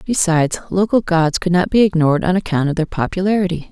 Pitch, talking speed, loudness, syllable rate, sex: 180 Hz, 195 wpm, -16 LUFS, 6.3 syllables/s, female